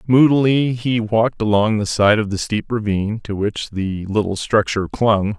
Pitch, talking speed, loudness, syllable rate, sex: 110 Hz, 180 wpm, -18 LUFS, 4.8 syllables/s, male